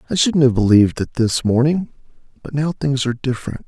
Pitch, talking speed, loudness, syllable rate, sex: 130 Hz, 195 wpm, -17 LUFS, 6.3 syllables/s, male